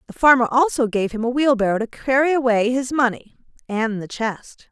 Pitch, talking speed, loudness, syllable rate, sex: 240 Hz, 190 wpm, -19 LUFS, 5.3 syllables/s, female